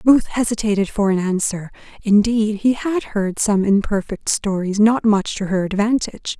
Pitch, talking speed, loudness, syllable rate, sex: 210 Hz, 160 wpm, -18 LUFS, 4.7 syllables/s, female